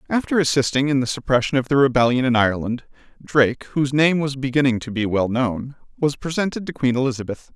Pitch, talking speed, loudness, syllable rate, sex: 130 Hz, 190 wpm, -20 LUFS, 6.3 syllables/s, male